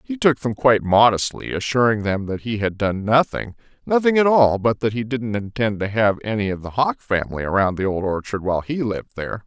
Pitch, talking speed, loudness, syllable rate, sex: 110 Hz, 220 wpm, -20 LUFS, 5.7 syllables/s, male